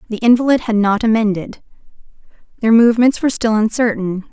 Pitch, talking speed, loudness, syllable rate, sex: 225 Hz, 140 wpm, -15 LUFS, 6.2 syllables/s, female